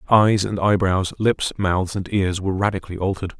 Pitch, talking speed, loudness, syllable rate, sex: 95 Hz, 175 wpm, -21 LUFS, 5.5 syllables/s, male